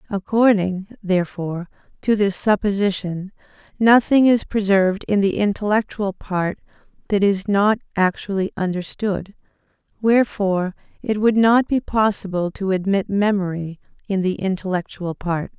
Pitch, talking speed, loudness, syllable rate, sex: 200 Hz, 115 wpm, -20 LUFS, 4.7 syllables/s, female